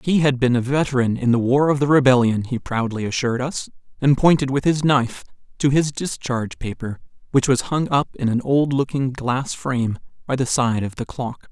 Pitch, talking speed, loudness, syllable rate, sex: 130 Hz, 210 wpm, -20 LUFS, 5.3 syllables/s, male